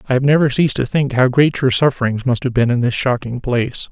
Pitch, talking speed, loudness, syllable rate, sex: 130 Hz, 260 wpm, -16 LUFS, 6.2 syllables/s, male